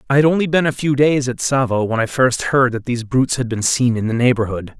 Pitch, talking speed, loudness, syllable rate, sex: 125 Hz, 275 wpm, -17 LUFS, 6.1 syllables/s, male